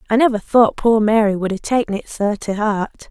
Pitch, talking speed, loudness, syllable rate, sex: 215 Hz, 230 wpm, -17 LUFS, 5.2 syllables/s, female